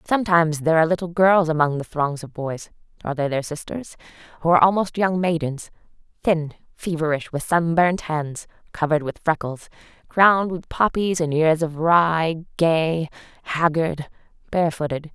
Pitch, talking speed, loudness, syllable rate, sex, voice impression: 160 Hz, 140 wpm, -21 LUFS, 5.1 syllables/s, female, feminine, adult-like, tensed, hard, fluent, intellectual, elegant, lively, slightly strict, sharp